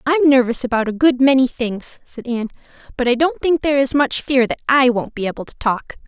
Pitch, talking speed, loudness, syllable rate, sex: 260 Hz, 235 wpm, -17 LUFS, 5.7 syllables/s, female